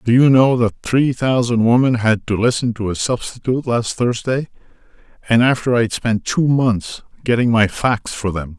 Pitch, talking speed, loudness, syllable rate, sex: 120 Hz, 175 wpm, -17 LUFS, 4.7 syllables/s, male